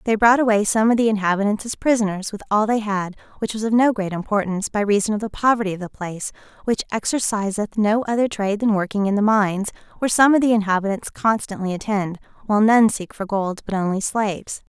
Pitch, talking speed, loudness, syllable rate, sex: 210 Hz, 210 wpm, -20 LUFS, 6.3 syllables/s, female